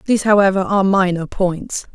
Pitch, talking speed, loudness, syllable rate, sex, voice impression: 195 Hz, 155 wpm, -16 LUFS, 5.8 syllables/s, female, very feminine, adult-like, slightly middle-aged, thin, slightly relaxed, slightly weak, dark, hard, very clear, very fluent, slightly cute, refreshing, sincere, slightly calm, friendly, reassuring, very unique, very elegant, slightly wild, very sweet, slightly lively, kind, modest, slightly light